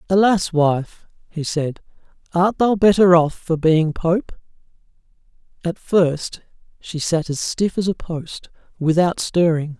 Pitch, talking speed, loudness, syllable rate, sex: 170 Hz, 135 wpm, -19 LUFS, 3.8 syllables/s, male